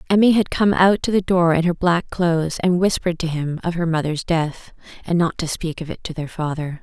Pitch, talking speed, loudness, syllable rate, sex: 170 Hz, 245 wpm, -20 LUFS, 5.4 syllables/s, female